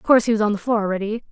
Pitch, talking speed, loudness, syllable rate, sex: 215 Hz, 365 wpm, -20 LUFS, 8.9 syllables/s, female